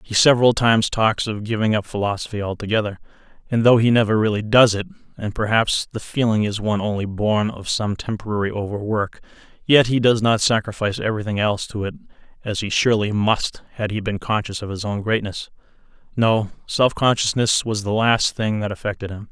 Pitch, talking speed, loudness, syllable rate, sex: 110 Hz, 185 wpm, -20 LUFS, 5.8 syllables/s, male